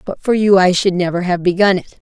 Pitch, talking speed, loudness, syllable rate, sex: 185 Hz, 255 wpm, -14 LUFS, 6.3 syllables/s, female